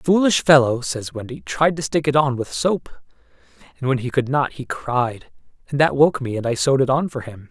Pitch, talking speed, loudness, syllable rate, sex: 130 Hz, 240 wpm, -20 LUFS, 5.4 syllables/s, male